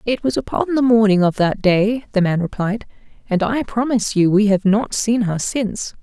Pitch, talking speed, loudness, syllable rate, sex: 215 Hz, 210 wpm, -18 LUFS, 5.1 syllables/s, female